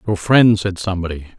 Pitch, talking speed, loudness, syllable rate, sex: 95 Hz, 175 wpm, -16 LUFS, 6.2 syllables/s, male